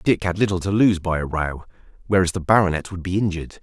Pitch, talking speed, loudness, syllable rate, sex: 90 Hz, 230 wpm, -21 LUFS, 6.4 syllables/s, male